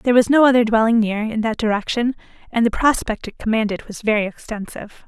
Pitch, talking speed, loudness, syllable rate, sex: 225 Hz, 200 wpm, -19 LUFS, 6.2 syllables/s, female